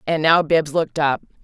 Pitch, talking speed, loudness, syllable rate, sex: 155 Hz, 210 wpm, -18 LUFS, 5.5 syllables/s, female